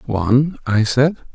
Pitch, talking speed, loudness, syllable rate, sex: 130 Hz, 135 wpm, -17 LUFS, 3.5 syllables/s, male